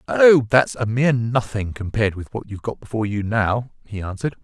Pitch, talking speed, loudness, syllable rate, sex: 115 Hz, 205 wpm, -20 LUFS, 6.0 syllables/s, male